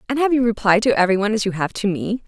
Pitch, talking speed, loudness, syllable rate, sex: 215 Hz, 315 wpm, -18 LUFS, 7.7 syllables/s, female